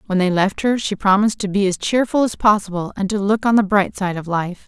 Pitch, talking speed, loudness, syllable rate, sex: 200 Hz, 270 wpm, -18 LUFS, 5.8 syllables/s, female